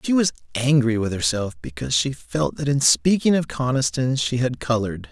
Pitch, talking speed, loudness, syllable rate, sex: 125 Hz, 190 wpm, -21 LUFS, 5.2 syllables/s, male